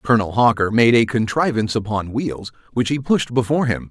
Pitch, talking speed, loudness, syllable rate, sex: 115 Hz, 185 wpm, -18 LUFS, 5.9 syllables/s, male